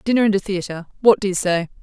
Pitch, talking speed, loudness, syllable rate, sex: 195 Hz, 230 wpm, -19 LUFS, 6.7 syllables/s, female